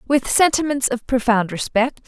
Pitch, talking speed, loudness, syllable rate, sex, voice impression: 250 Hz, 145 wpm, -18 LUFS, 4.7 syllables/s, female, feminine, adult-like, tensed, powerful, bright, clear, intellectual, calm, friendly, reassuring, slightly elegant, lively, kind, light